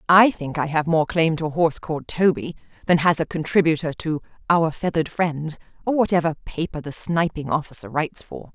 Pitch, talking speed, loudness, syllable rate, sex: 160 Hz, 190 wpm, -22 LUFS, 5.6 syllables/s, female